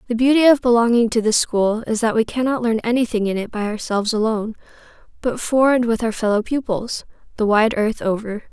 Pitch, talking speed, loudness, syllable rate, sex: 230 Hz, 205 wpm, -19 LUFS, 5.8 syllables/s, female